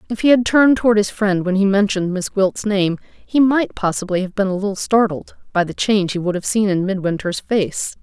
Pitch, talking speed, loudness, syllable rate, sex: 200 Hz, 230 wpm, -18 LUFS, 5.6 syllables/s, female